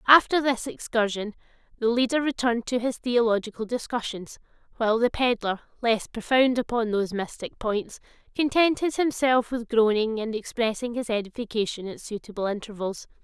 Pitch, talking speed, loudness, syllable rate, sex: 230 Hz, 135 wpm, -25 LUFS, 5.3 syllables/s, female